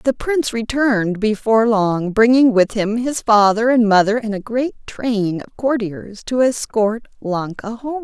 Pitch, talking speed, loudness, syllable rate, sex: 225 Hz, 165 wpm, -17 LUFS, 4.4 syllables/s, female